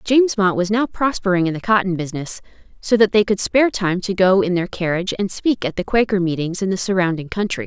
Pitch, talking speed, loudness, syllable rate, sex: 195 Hz, 235 wpm, -18 LUFS, 6.1 syllables/s, female